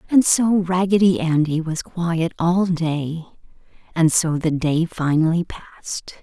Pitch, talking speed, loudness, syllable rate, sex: 170 Hz, 135 wpm, -19 LUFS, 3.9 syllables/s, female